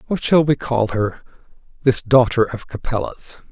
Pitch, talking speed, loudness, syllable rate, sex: 125 Hz, 135 wpm, -19 LUFS, 4.7 syllables/s, male